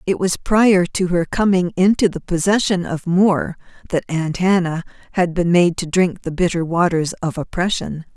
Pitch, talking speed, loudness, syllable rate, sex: 175 Hz, 175 wpm, -18 LUFS, 4.8 syllables/s, female